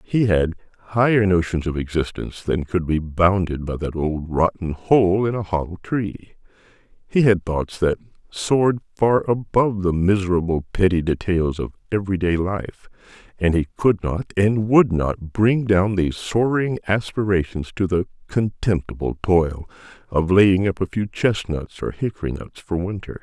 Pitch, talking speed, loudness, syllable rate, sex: 95 Hz, 160 wpm, -21 LUFS, 4.6 syllables/s, male